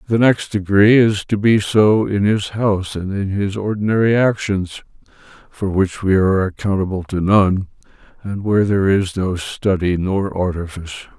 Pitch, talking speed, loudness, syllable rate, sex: 100 Hz, 160 wpm, -17 LUFS, 4.8 syllables/s, male